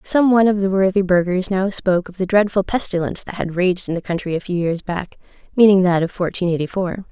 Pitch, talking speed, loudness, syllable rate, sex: 185 Hz, 235 wpm, -18 LUFS, 6.1 syllables/s, female